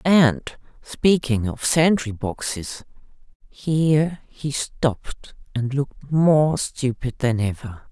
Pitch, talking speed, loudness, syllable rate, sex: 145 Hz, 100 wpm, -21 LUFS, 3.5 syllables/s, female